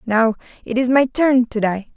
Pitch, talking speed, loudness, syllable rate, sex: 240 Hz, 215 wpm, -18 LUFS, 4.6 syllables/s, female